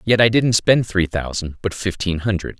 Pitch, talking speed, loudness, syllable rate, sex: 95 Hz, 210 wpm, -19 LUFS, 5.0 syllables/s, male